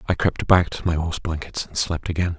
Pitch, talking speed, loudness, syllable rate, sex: 85 Hz, 250 wpm, -22 LUFS, 5.9 syllables/s, male